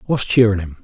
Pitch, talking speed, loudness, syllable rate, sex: 105 Hz, 215 wpm, -16 LUFS, 6.3 syllables/s, male